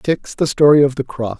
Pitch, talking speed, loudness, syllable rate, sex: 135 Hz, 260 wpm, -15 LUFS, 6.7 syllables/s, male